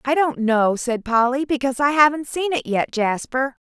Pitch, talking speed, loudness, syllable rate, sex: 265 Hz, 195 wpm, -20 LUFS, 4.9 syllables/s, female